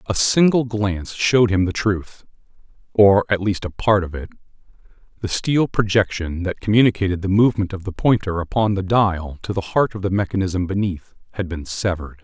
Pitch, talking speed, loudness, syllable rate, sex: 100 Hz, 175 wpm, -19 LUFS, 5.4 syllables/s, male